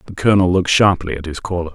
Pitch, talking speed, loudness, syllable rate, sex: 90 Hz, 240 wpm, -16 LUFS, 7.6 syllables/s, male